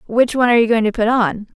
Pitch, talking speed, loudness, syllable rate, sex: 230 Hz, 305 wpm, -15 LUFS, 7.5 syllables/s, female